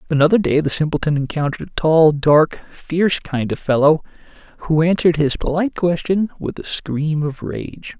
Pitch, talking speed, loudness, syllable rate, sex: 160 Hz, 165 wpm, -18 LUFS, 5.2 syllables/s, male